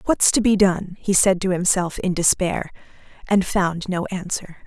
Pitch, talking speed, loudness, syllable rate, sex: 185 Hz, 180 wpm, -20 LUFS, 4.5 syllables/s, female